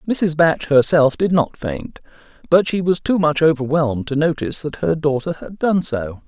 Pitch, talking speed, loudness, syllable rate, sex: 155 Hz, 190 wpm, -18 LUFS, 4.9 syllables/s, male